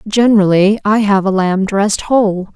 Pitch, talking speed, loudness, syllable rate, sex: 200 Hz, 165 wpm, -13 LUFS, 5.1 syllables/s, female